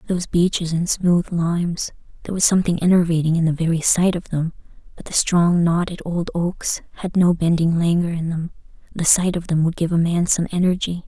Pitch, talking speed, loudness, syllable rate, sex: 170 Hz, 190 wpm, -19 LUFS, 5.5 syllables/s, female